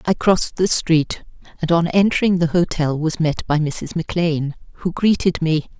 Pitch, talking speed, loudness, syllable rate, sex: 165 Hz, 175 wpm, -19 LUFS, 4.8 syllables/s, female